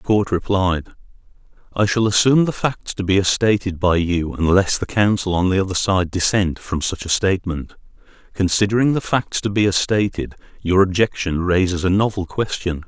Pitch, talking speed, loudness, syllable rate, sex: 95 Hz, 180 wpm, -19 LUFS, 5.2 syllables/s, male